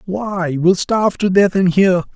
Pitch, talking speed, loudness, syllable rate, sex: 190 Hz, 195 wpm, -15 LUFS, 4.7 syllables/s, male